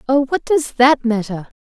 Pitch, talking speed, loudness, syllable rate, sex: 260 Hz, 185 wpm, -16 LUFS, 4.6 syllables/s, female